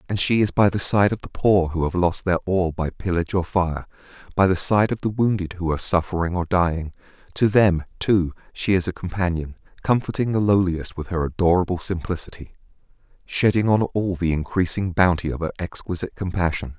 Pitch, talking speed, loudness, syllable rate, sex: 90 Hz, 190 wpm, -22 LUFS, 5.6 syllables/s, male